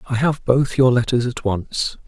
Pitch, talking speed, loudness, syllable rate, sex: 125 Hz, 205 wpm, -19 LUFS, 4.2 syllables/s, male